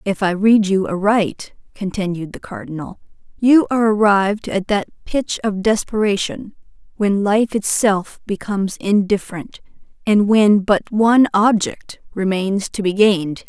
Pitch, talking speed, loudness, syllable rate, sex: 205 Hz, 135 wpm, -17 LUFS, 4.4 syllables/s, female